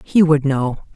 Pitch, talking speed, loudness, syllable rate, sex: 150 Hz, 190 wpm, -17 LUFS, 3.8 syllables/s, female